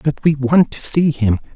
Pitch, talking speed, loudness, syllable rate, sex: 140 Hz, 230 wpm, -15 LUFS, 4.8 syllables/s, male